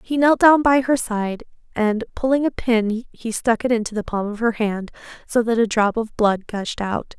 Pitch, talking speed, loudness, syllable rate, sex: 230 Hz, 225 wpm, -20 LUFS, 4.7 syllables/s, female